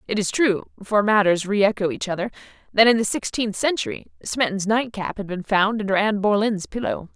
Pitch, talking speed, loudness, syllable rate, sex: 205 Hz, 195 wpm, -21 LUFS, 4.7 syllables/s, female